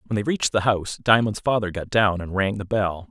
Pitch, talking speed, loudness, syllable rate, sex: 105 Hz, 250 wpm, -22 LUFS, 5.9 syllables/s, male